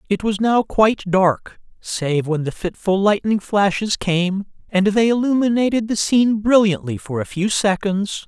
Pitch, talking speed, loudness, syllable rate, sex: 200 Hz, 160 wpm, -18 LUFS, 4.5 syllables/s, male